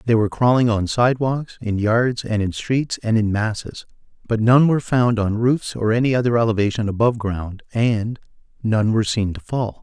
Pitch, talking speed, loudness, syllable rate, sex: 115 Hz, 185 wpm, -19 LUFS, 5.2 syllables/s, male